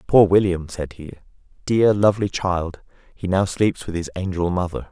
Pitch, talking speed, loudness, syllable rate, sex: 95 Hz, 170 wpm, -20 LUFS, 4.8 syllables/s, male